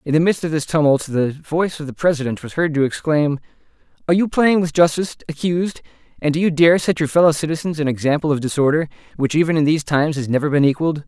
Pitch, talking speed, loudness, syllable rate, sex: 155 Hz, 220 wpm, -18 LUFS, 6.9 syllables/s, male